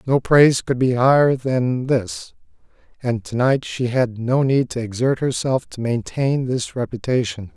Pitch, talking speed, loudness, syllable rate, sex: 125 Hz, 165 wpm, -19 LUFS, 4.3 syllables/s, male